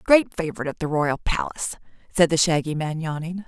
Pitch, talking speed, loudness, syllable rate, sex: 165 Hz, 190 wpm, -23 LUFS, 6.1 syllables/s, female